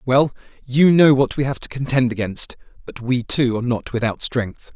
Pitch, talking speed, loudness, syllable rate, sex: 125 Hz, 200 wpm, -19 LUFS, 5.0 syllables/s, male